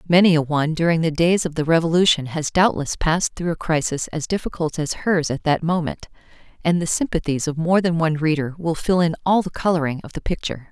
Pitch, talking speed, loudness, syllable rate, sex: 165 Hz, 220 wpm, -20 LUFS, 6.0 syllables/s, female